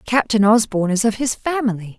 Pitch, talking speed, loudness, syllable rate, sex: 220 Hz, 180 wpm, -18 LUFS, 5.3 syllables/s, female